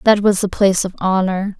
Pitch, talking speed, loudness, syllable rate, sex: 195 Hz, 225 wpm, -16 LUFS, 5.6 syllables/s, female